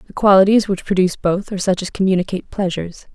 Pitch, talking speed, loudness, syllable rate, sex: 190 Hz, 190 wpm, -17 LUFS, 7.1 syllables/s, female